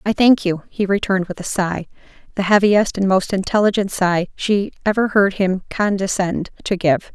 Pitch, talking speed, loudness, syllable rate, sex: 195 Hz, 170 wpm, -18 LUFS, 4.9 syllables/s, female